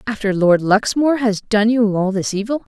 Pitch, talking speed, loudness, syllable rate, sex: 215 Hz, 195 wpm, -17 LUFS, 5.1 syllables/s, female